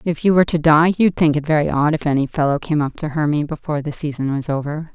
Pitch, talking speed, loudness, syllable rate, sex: 150 Hz, 265 wpm, -18 LUFS, 6.4 syllables/s, female